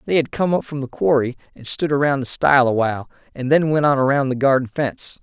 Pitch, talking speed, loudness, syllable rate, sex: 135 Hz, 255 wpm, -19 LUFS, 6.2 syllables/s, male